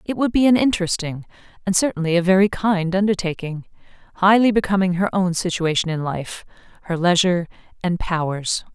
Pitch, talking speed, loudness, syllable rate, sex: 185 Hz, 150 wpm, -20 LUFS, 5.7 syllables/s, female